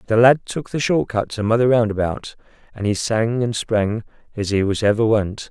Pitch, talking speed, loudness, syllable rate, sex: 110 Hz, 205 wpm, -19 LUFS, 5.0 syllables/s, male